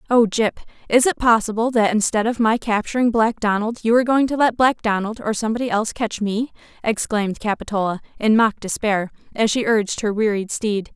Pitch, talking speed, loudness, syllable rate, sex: 220 Hz, 190 wpm, -20 LUFS, 5.7 syllables/s, female